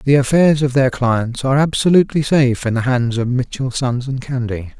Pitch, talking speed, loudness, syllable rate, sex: 130 Hz, 200 wpm, -16 LUFS, 5.6 syllables/s, male